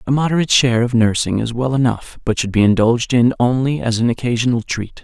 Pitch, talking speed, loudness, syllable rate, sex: 120 Hz, 215 wpm, -16 LUFS, 6.3 syllables/s, male